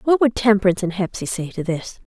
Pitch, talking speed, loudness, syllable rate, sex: 195 Hz, 230 wpm, -20 LUFS, 6.3 syllables/s, female